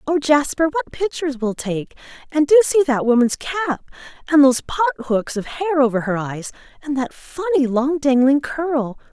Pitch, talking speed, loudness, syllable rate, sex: 285 Hz, 170 wpm, -19 LUFS, 4.6 syllables/s, female